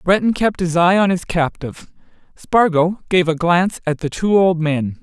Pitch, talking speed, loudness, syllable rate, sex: 175 Hz, 190 wpm, -17 LUFS, 4.8 syllables/s, male